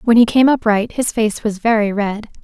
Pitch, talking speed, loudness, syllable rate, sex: 220 Hz, 220 wpm, -16 LUFS, 5.0 syllables/s, female